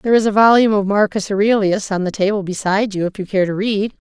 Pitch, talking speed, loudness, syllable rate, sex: 205 Hz, 250 wpm, -16 LUFS, 6.7 syllables/s, female